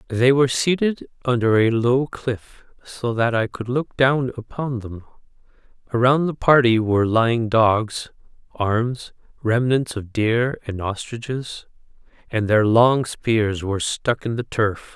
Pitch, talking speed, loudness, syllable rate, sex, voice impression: 120 Hz, 145 wpm, -20 LUFS, 4.0 syllables/s, male, masculine, middle-aged, tensed, powerful, slightly muffled, sincere, calm, friendly, wild, lively, kind, modest